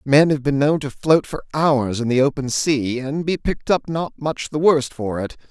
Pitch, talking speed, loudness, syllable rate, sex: 140 Hz, 220 wpm, -20 LUFS, 4.9 syllables/s, male